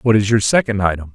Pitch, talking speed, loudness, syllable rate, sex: 105 Hz, 260 wpm, -16 LUFS, 6.3 syllables/s, male